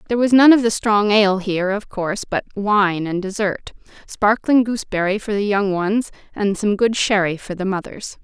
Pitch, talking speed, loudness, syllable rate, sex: 205 Hz, 190 wpm, -18 LUFS, 5.2 syllables/s, female